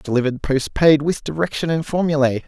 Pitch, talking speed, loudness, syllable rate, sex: 145 Hz, 145 wpm, -19 LUFS, 5.8 syllables/s, male